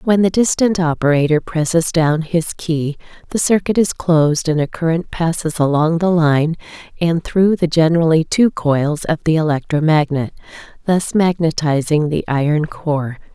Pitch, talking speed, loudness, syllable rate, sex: 160 Hz, 150 wpm, -16 LUFS, 4.4 syllables/s, female